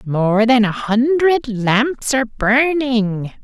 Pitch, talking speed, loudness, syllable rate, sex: 240 Hz, 120 wpm, -16 LUFS, 3.1 syllables/s, male